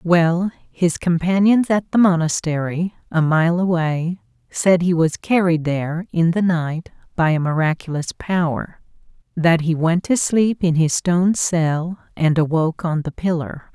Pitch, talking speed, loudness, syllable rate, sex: 170 Hz, 155 wpm, -19 LUFS, 4.2 syllables/s, female